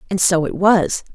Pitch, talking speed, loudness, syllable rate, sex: 180 Hz, 210 wpm, -16 LUFS, 4.6 syllables/s, female